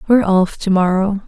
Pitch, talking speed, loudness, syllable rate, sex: 195 Hz, 190 wpm, -15 LUFS, 5.5 syllables/s, female